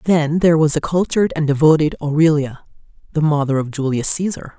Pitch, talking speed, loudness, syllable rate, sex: 155 Hz, 170 wpm, -17 LUFS, 5.9 syllables/s, female